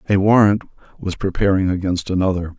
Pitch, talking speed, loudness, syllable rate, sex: 95 Hz, 140 wpm, -18 LUFS, 6.0 syllables/s, male